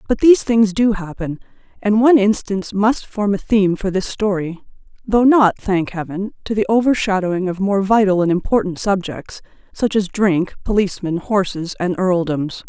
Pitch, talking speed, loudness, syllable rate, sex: 200 Hz, 160 wpm, -17 LUFS, 5.1 syllables/s, female